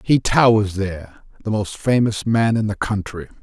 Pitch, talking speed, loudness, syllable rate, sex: 105 Hz, 175 wpm, -19 LUFS, 4.7 syllables/s, male